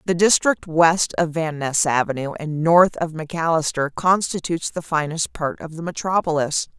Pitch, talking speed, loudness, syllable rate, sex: 165 Hz, 160 wpm, -20 LUFS, 4.9 syllables/s, female